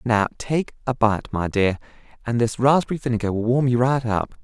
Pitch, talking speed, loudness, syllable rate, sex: 120 Hz, 205 wpm, -21 LUFS, 5.3 syllables/s, male